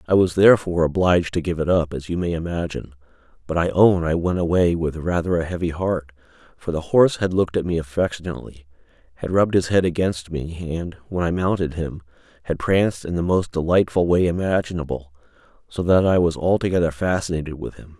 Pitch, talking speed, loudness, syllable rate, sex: 85 Hz, 195 wpm, -21 LUFS, 6.1 syllables/s, male